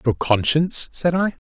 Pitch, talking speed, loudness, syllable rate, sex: 155 Hz, 160 wpm, -20 LUFS, 4.8 syllables/s, male